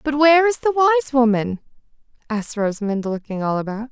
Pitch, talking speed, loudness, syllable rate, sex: 250 Hz, 170 wpm, -19 LUFS, 6.5 syllables/s, female